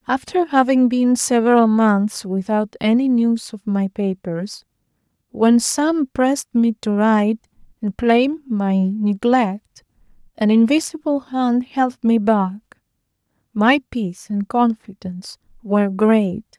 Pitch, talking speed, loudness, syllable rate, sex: 230 Hz, 120 wpm, -18 LUFS, 3.8 syllables/s, female